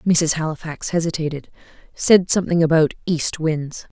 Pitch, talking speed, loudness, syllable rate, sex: 160 Hz, 120 wpm, -19 LUFS, 4.8 syllables/s, female